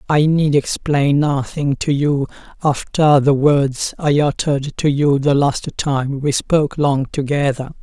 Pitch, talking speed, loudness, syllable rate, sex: 140 Hz, 155 wpm, -17 LUFS, 3.9 syllables/s, male